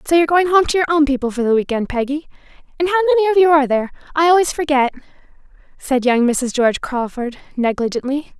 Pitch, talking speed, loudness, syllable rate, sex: 290 Hz, 195 wpm, -17 LUFS, 7.0 syllables/s, female